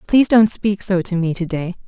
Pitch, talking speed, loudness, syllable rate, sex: 190 Hz, 225 wpm, -17 LUFS, 5.4 syllables/s, female